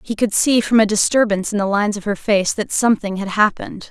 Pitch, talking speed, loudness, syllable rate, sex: 210 Hz, 245 wpm, -17 LUFS, 6.3 syllables/s, female